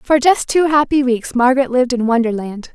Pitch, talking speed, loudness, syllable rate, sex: 255 Hz, 195 wpm, -15 LUFS, 5.5 syllables/s, female